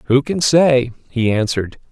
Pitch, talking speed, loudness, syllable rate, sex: 130 Hz, 155 wpm, -16 LUFS, 4.8 syllables/s, male